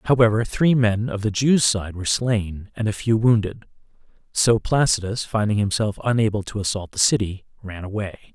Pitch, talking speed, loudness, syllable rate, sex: 110 Hz, 175 wpm, -21 LUFS, 5.3 syllables/s, male